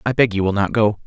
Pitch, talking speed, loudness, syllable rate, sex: 105 Hz, 340 wpm, -18 LUFS, 6.5 syllables/s, male